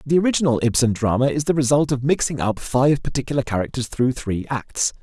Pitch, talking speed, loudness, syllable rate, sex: 130 Hz, 190 wpm, -20 LUFS, 5.8 syllables/s, male